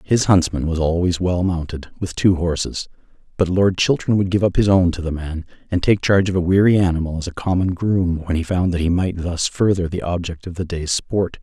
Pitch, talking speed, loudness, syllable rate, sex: 90 Hz, 235 wpm, -19 LUFS, 5.4 syllables/s, male